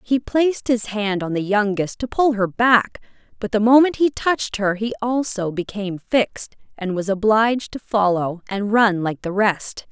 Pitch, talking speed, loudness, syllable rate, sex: 215 Hz, 190 wpm, -20 LUFS, 4.6 syllables/s, female